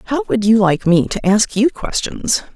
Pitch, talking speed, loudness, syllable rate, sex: 220 Hz, 210 wpm, -16 LUFS, 4.2 syllables/s, female